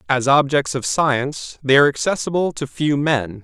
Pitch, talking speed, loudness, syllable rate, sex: 135 Hz, 175 wpm, -18 LUFS, 5.0 syllables/s, male